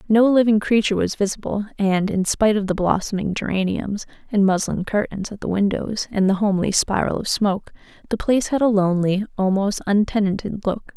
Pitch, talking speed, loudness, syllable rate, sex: 200 Hz, 175 wpm, -20 LUFS, 5.7 syllables/s, female